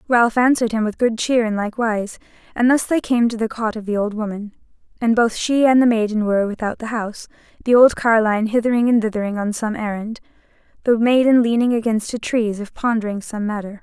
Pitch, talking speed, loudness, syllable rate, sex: 225 Hz, 215 wpm, -18 LUFS, 6.1 syllables/s, female